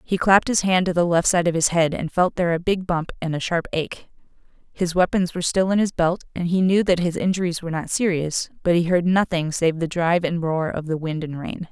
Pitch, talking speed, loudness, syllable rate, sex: 170 Hz, 260 wpm, -21 LUFS, 5.8 syllables/s, female